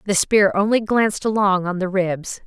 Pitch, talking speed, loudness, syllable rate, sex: 195 Hz, 195 wpm, -19 LUFS, 4.8 syllables/s, female